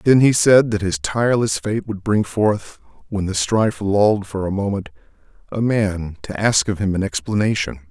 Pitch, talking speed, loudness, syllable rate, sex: 100 Hz, 195 wpm, -19 LUFS, 5.0 syllables/s, male